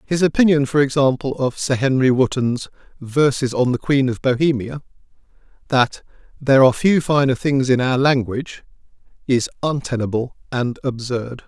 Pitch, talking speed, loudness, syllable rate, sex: 130 Hz, 135 wpm, -18 LUFS, 5.1 syllables/s, male